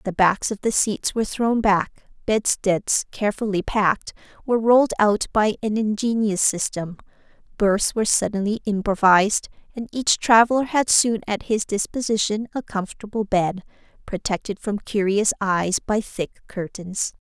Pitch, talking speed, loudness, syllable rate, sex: 210 Hz, 140 wpm, -21 LUFS, 4.7 syllables/s, female